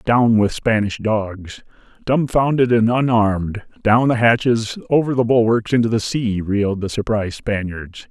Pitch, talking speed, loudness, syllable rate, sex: 115 Hz, 150 wpm, -18 LUFS, 4.5 syllables/s, male